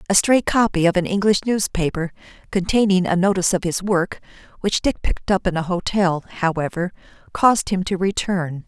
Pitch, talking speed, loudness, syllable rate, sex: 185 Hz, 175 wpm, -20 LUFS, 5.3 syllables/s, female